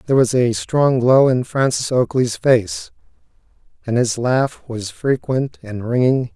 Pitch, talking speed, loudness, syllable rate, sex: 125 Hz, 150 wpm, -18 LUFS, 4.0 syllables/s, male